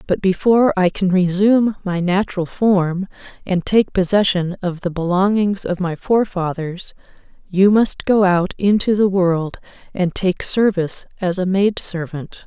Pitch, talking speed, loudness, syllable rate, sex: 190 Hz, 145 wpm, -17 LUFS, 4.5 syllables/s, female